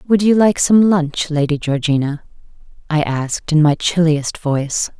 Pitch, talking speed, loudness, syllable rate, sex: 160 Hz, 155 wpm, -16 LUFS, 4.6 syllables/s, female